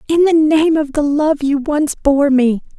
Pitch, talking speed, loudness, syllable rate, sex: 295 Hz, 215 wpm, -14 LUFS, 4.0 syllables/s, female